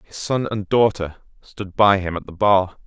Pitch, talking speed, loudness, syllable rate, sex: 100 Hz, 210 wpm, -19 LUFS, 4.4 syllables/s, male